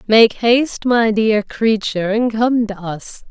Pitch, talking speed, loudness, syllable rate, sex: 220 Hz, 165 wpm, -16 LUFS, 3.9 syllables/s, female